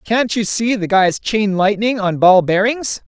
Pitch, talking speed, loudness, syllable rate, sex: 210 Hz, 190 wpm, -15 LUFS, 4.1 syllables/s, female